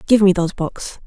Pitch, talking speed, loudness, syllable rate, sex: 190 Hz, 225 wpm, -17 LUFS, 5.8 syllables/s, female